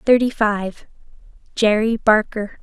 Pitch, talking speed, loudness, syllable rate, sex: 220 Hz, 90 wpm, -18 LUFS, 3.7 syllables/s, female